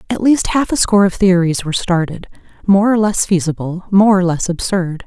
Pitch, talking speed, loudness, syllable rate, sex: 190 Hz, 190 wpm, -14 LUFS, 5.4 syllables/s, female